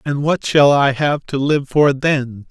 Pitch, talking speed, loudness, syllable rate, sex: 140 Hz, 215 wpm, -16 LUFS, 3.8 syllables/s, male